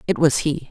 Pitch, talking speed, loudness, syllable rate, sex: 150 Hz, 255 wpm, -19 LUFS, 5.5 syllables/s, female